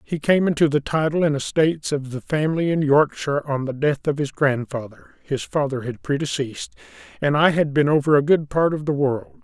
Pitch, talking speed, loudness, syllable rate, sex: 145 Hz, 195 wpm, -21 LUFS, 5.6 syllables/s, male